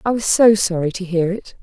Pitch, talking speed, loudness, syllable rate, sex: 195 Hz, 260 wpm, -17 LUFS, 5.3 syllables/s, female